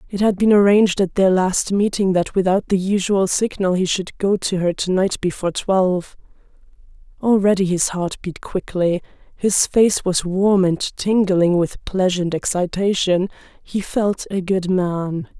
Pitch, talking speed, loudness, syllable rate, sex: 190 Hz, 160 wpm, -19 LUFS, 4.3 syllables/s, female